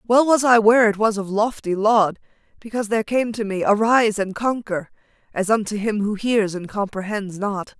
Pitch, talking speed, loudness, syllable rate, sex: 215 Hz, 190 wpm, -20 LUFS, 5.2 syllables/s, female